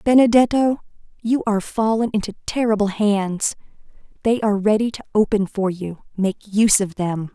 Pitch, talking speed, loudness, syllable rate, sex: 210 Hz, 140 wpm, -20 LUFS, 5.2 syllables/s, female